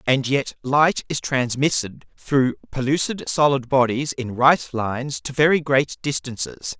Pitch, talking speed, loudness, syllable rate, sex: 135 Hz, 140 wpm, -21 LUFS, 4.2 syllables/s, male